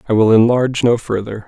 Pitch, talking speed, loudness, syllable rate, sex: 115 Hz, 205 wpm, -14 LUFS, 6.2 syllables/s, male